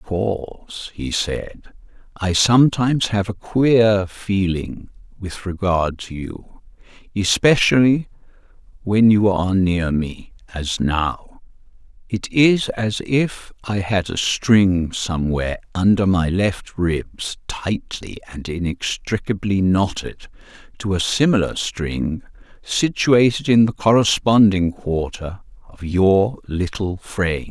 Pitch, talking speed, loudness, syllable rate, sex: 100 Hz, 110 wpm, -19 LUFS, 3.9 syllables/s, male